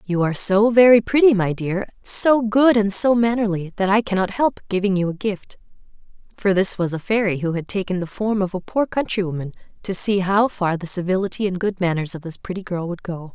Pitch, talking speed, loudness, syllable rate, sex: 195 Hz, 225 wpm, -20 LUFS, 2.5 syllables/s, female